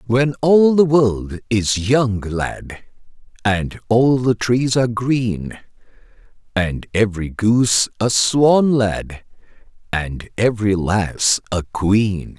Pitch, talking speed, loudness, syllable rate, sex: 110 Hz, 115 wpm, -17 LUFS, 3.2 syllables/s, male